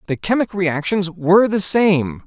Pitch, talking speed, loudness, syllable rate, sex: 180 Hz, 160 wpm, -17 LUFS, 4.3 syllables/s, male